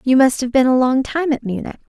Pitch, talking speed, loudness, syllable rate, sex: 260 Hz, 275 wpm, -17 LUFS, 5.9 syllables/s, female